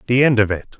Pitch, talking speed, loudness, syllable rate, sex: 115 Hz, 300 wpm, -16 LUFS, 7.7 syllables/s, male